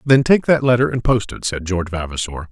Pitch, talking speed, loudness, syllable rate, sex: 110 Hz, 240 wpm, -18 LUFS, 5.8 syllables/s, male